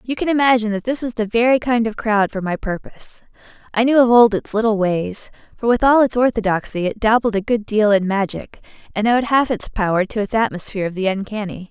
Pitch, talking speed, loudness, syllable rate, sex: 220 Hz, 225 wpm, -18 LUFS, 5.9 syllables/s, female